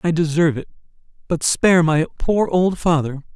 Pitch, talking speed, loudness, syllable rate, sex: 165 Hz, 160 wpm, -18 LUFS, 5.4 syllables/s, male